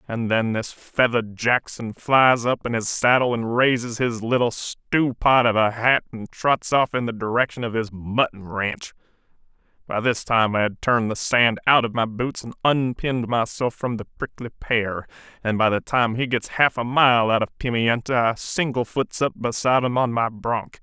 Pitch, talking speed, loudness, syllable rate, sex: 120 Hz, 195 wpm, -21 LUFS, 4.7 syllables/s, male